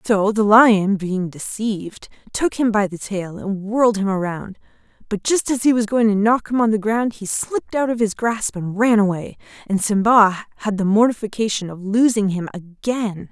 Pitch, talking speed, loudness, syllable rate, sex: 210 Hz, 200 wpm, -19 LUFS, 4.8 syllables/s, female